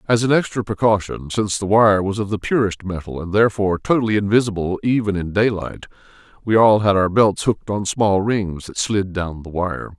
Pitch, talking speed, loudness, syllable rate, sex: 100 Hz, 200 wpm, -19 LUFS, 5.5 syllables/s, male